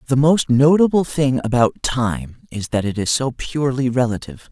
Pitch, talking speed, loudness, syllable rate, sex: 130 Hz, 175 wpm, -18 LUFS, 5.1 syllables/s, male